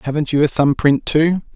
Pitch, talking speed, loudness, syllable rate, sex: 150 Hz, 230 wpm, -16 LUFS, 5.3 syllables/s, male